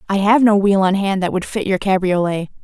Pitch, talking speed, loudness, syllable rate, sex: 195 Hz, 250 wpm, -16 LUFS, 5.5 syllables/s, female